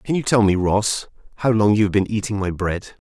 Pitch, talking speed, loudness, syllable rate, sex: 105 Hz, 255 wpm, -20 LUFS, 5.4 syllables/s, male